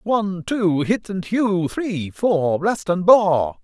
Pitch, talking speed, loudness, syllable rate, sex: 190 Hz, 165 wpm, -19 LUFS, 3.2 syllables/s, male